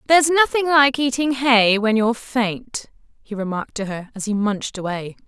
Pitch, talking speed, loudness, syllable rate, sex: 235 Hz, 180 wpm, -19 LUFS, 5.2 syllables/s, female